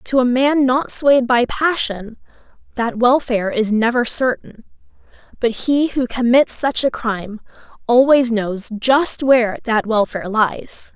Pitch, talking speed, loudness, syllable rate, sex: 245 Hz, 140 wpm, -17 LUFS, 4.1 syllables/s, female